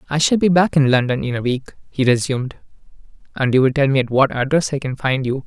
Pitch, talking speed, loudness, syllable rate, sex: 135 Hz, 250 wpm, -18 LUFS, 6.2 syllables/s, male